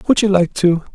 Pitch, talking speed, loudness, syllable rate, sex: 185 Hz, 255 wpm, -15 LUFS, 4.8 syllables/s, male